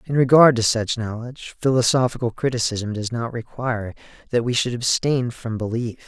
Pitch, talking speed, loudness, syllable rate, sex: 120 Hz, 160 wpm, -21 LUFS, 5.3 syllables/s, male